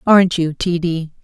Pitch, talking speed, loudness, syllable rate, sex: 170 Hz, 195 wpm, -17 LUFS, 4.9 syllables/s, female